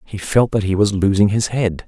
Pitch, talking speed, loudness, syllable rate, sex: 100 Hz, 255 wpm, -17 LUFS, 5.1 syllables/s, male